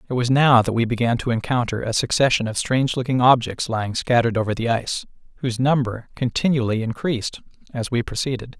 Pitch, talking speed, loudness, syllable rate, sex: 120 Hz, 180 wpm, -21 LUFS, 6.3 syllables/s, male